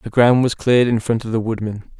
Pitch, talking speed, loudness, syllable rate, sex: 115 Hz, 270 wpm, -18 LUFS, 6.0 syllables/s, male